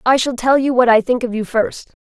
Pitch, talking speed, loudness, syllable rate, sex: 245 Hz, 295 wpm, -16 LUFS, 5.4 syllables/s, female